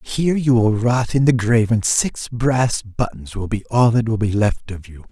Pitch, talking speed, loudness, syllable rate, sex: 115 Hz, 235 wpm, -18 LUFS, 4.7 syllables/s, male